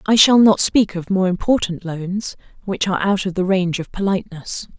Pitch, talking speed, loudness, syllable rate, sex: 190 Hz, 200 wpm, -18 LUFS, 5.4 syllables/s, female